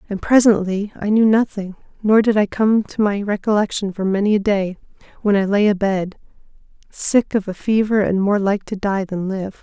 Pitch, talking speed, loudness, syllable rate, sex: 205 Hz, 195 wpm, -18 LUFS, 5.0 syllables/s, female